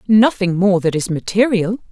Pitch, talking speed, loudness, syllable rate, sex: 195 Hz, 155 wpm, -16 LUFS, 4.8 syllables/s, female